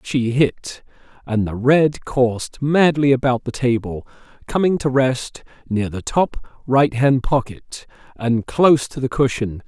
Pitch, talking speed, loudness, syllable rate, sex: 130 Hz, 145 wpm, -18 LUFS, 3.9 syllables/s, male